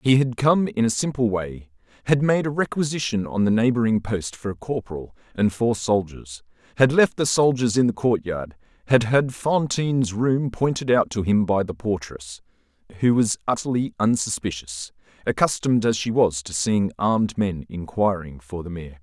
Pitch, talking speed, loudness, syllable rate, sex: 110 Hz, 175 wpm, -22 LUFS, 4.9 syllables/s, male